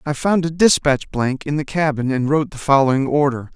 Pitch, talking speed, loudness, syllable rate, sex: 145 Hz, 220 wpm, -18 LUFS, 5.6 syllables/s, male